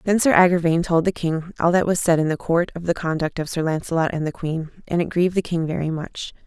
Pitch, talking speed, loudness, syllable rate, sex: 170 Hz, 270 wpm, -21 LUFS, 6.1 syllables/s, female